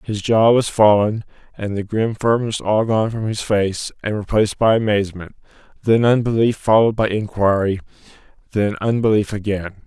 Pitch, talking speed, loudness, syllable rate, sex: 105 Hz, 150 wpm, -18 LUFS, 5.2 syllables/s, male